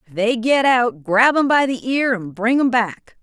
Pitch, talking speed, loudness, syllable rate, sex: 235 Hz, 240 wpm, -17 LUFS, 4.3 syllables/s, female